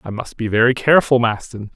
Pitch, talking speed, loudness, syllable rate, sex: 120 Hz, 205 wpm, -16 LUFS, 6.1 syllables/s, male